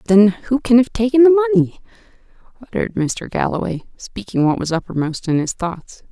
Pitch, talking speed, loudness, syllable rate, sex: 195 Hz, 165 wpm, -17 LUFS, 5.5 syllables/s, female